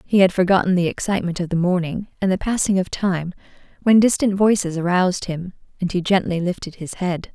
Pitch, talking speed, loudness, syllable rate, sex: 185 Hz, 195 wpm, -20 LUFS, 5.8 syllables/s, female